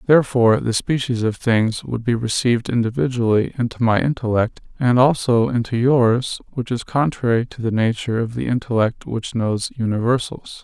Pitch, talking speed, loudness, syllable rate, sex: 120 Hz, 160 wpm, -19 LUFS, 5.2 syllables/s, male